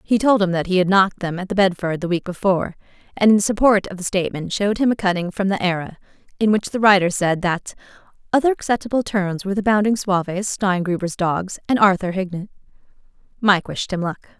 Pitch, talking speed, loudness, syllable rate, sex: 195 Hz, 205 wpm, -19 LUFS, 6.1 syllables/s, female